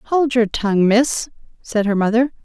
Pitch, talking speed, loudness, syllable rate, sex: 230 Hz, 170 wpm, -17 LUFS, 4.5 syllables/s, female